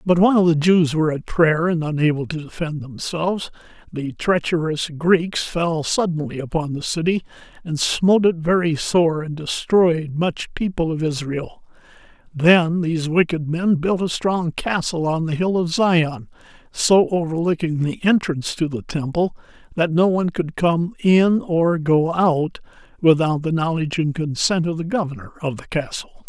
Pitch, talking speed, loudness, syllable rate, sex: 165 Hz, 160 wpm, -20 LUFS, 4.6 syllables/s, male